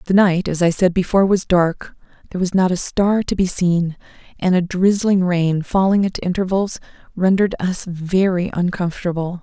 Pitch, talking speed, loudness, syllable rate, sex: 185 Hz, 170 wpm, -18 LUFS, 5.1 syllables/s, female